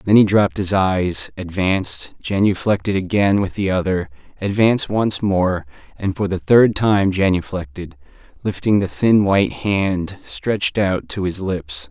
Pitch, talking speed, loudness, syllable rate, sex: 95 Hz, 150 wpm, -18 LUFS, 4.4 syllables/s, male